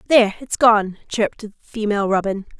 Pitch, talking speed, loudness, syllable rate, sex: 215 Hz, 160 wpm, -19 LUFS, 5.8 syllables/s, female